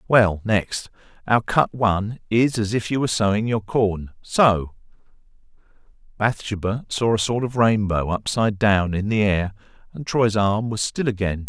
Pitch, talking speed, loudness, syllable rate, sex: 105 Hz, 155 wpm, -21 LUFS, 4.5 syllables/s, male